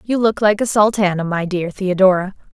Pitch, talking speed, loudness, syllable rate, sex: 195 Hz, 190 wpm, -16 LUFS, 5.3 syllables/s, female